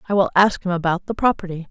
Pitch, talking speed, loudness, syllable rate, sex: 185 Hz, 245 wpm, -19 LUFS, 6.8 syllables/s, female